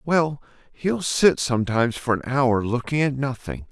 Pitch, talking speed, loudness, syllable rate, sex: 130 Hz, 160 wpm, -22 LUFS, 4.6 syllables/s, male